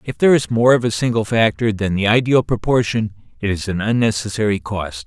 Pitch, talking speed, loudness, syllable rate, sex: 110 Hz, 200 wpm, -18 LUFS, 5.7 syllables/s, male